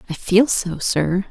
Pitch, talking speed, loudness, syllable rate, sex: 185 Hz, 185 wpm, -18 LUFS, 3.6 syllables/s, female